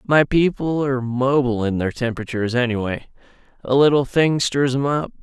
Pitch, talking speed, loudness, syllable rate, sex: 130 Hz, 150 wpm, -19 LUFS, 5.5 syllables/s, male